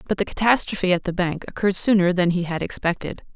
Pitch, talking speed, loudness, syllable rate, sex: 185 Hz, 215 wpm, -21 LUFS, 6.6 syllables/s, female